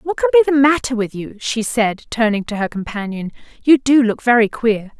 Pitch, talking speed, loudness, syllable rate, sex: 235 Hz, 215 wpm, -17 LUFS, 5.4 syllables/s, female